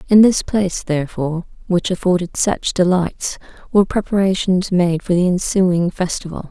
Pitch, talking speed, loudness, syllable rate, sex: 180 Hz, 140 wpm, -17 LUFS, 5.1 syllables/s, female